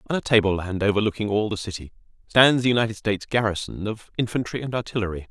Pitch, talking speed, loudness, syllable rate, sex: 105 Hz, 190 wpm, -23 LUFS, 6.7 syllables/s, male